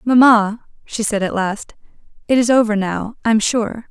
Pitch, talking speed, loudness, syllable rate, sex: 220 Hz, 170 wpm, -16 LUFS, 4.4 syllables/s, female